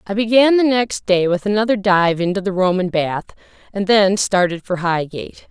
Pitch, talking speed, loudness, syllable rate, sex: 195 Hz, 185 wpm, -17 LUFS, 5.1 syllables/s, female